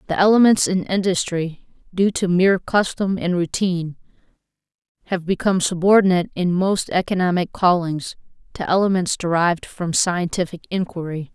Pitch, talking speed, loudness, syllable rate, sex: 180 Hz, 120 wpm, -19 LUFS, 5.3 syllables/s, female